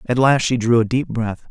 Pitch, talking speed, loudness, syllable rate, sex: 120 Hz, 280 wpm, -18 LUFS, 5.0 syllables/s, male